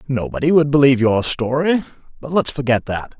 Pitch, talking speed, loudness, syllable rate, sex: 135 Hz, 170 wpm, -17 LUFS, 6.0 syllables/s, male